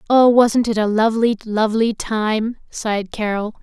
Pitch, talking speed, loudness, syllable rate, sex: 220 Hz, 150 wpm, -18 LUFS, 4.7 syllables/s, female